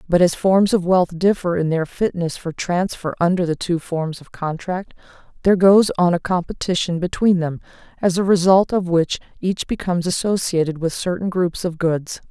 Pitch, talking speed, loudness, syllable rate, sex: 175 Hz, 180 wpm, -19 LUFS, 5.0 syllables/s, female